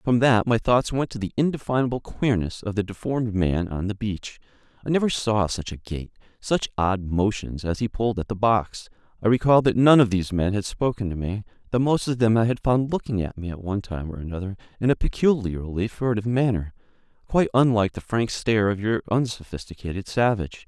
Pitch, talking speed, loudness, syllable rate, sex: 110 Hz, 205 wpm, -23 LUFS, 5.8 syllables/s, male